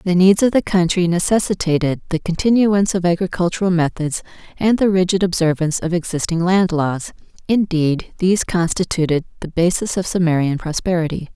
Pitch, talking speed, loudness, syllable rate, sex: 175 Hz, 145 wpm, -18 LUFS, 5.6 syllables/s, female